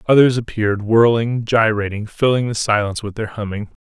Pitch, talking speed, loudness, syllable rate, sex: 110 Hz, 155 wpm, -17 LUFS, 5.6 syllables/s, male